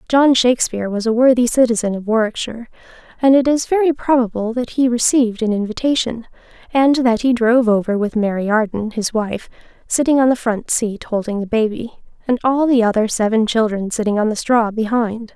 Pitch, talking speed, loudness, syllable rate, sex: 230 Hz, 185 wpm, -17 LUFS, 5.6 syllables/s, female